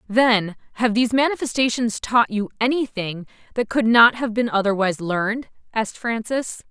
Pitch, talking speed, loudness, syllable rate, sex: 225 Hz, 145 wpm, -20 LUFS, 5.1 syllables/s, female